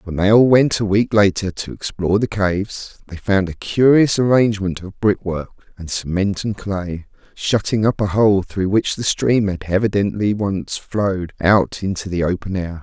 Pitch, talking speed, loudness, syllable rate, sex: 100 Hz, 180 wpm, -18 LUFS, 4.7 syllables/s, male